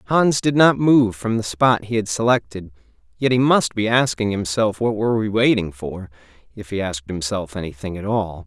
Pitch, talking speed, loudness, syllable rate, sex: 105 Hz, 200 wpm, -19 LUFS, 5.2 syllables/s, male